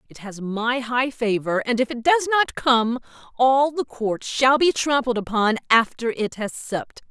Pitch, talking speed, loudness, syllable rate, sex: 245 Hz, 185 wpm, -21 LUFS, 4.3 syllables/s, female